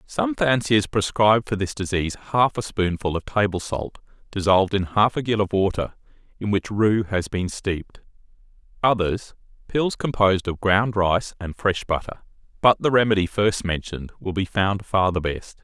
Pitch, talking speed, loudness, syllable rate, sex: 100 Hz, 175 wpm, -22 LUFS, 4.9 syllables/s, male